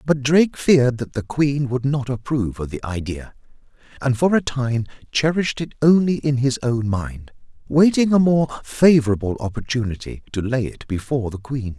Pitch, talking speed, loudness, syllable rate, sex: 130 Hz, 175 wpm, -20 LUFS, 5.1 syllables/s, male